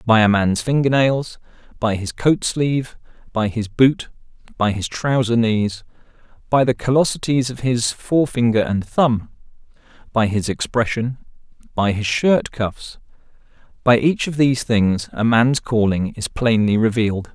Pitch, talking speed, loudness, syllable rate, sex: 115 Hz, 140 wpm, -19 LUFS, 4.4 syllables/s, male